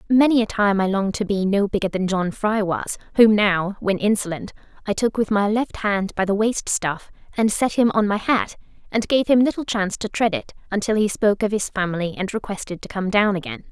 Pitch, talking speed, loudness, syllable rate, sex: 205 Hz, 230 wpm, -21 LUFS, 5.5 syllables/s, female